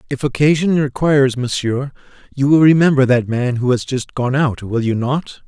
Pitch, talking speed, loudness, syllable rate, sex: 135 Hz, 185 wpm, -16 LUFS, 5.0 syllables/s, male